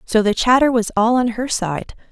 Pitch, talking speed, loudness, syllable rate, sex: 230 Hz, 225 wpm, -17 LUFS, 4.9 syllables/s, female